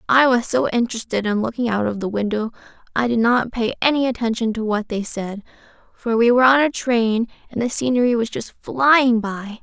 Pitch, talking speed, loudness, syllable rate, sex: 230 Hz, 205 wpm, -19 LUFS, 5.4 syllables/s, female